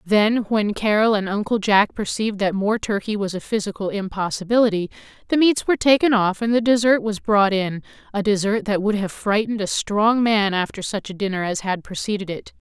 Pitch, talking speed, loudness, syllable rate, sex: 205 Hz, 195 wpm, -20 LUFS, 5.5 syllables/s, female